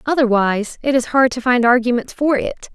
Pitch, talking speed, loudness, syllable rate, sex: 245 Hz, 195 wpm, -17 LUFS, 5.8 syllables/s, female